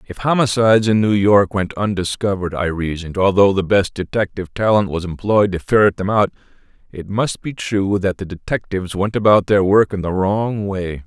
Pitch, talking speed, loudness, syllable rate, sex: 100 Hz, 190 wpm, -17 LUFS, 5.3 syllables/s, male